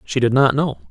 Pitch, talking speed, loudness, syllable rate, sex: 120 Hz, 265 wpm, -17 LUFS, 5.4 syllables/s, male